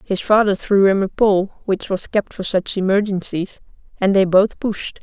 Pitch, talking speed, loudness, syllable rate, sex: 195 Hz, 190 wpm, -18 LUFS, 4.6 syllables/s, female